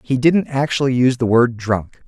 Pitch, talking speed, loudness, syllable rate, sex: 125 Hz, 205 wpm, -17 LUFS, 5.1 syllables/s, male